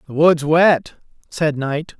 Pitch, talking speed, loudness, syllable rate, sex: 155 Hz, 150 wpm, -17 LUFS, 3.4 syllables/s, male